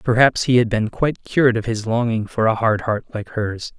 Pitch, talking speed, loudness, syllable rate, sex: 115 Hz, 240 wpm, -19 LUFS, 5.4 syllables/s, male